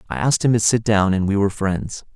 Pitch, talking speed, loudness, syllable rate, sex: 105 Hz, 280 wpm, -19 LUFS, 6.4 syllables/s, male